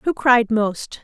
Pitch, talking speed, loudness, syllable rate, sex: 240 Hz, 175 wpm, -18 LUFS, 3.0 syllables/s, female